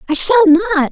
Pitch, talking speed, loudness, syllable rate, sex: 370 Hz, 200 wpm, -11 LUFS, 6.8 syllables/s, female